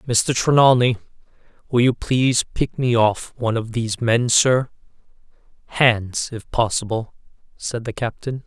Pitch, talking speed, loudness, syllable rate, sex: 120 Hz, 135 wpm, -19 LUFS, 4.4 syllables/s, male